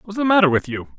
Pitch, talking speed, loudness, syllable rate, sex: 180 Hz, 305 wpm, -17 LUFS, 6.9 syllables/s, male